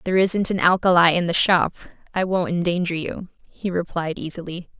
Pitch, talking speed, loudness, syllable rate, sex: 175 Hz, 175 wpm, -21 LUFS, 5.7 syllables/s, female